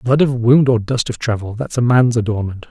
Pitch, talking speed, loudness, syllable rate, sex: 120 Hz, 220 wpm, -16 LUFS, 5.3 syllables/s, male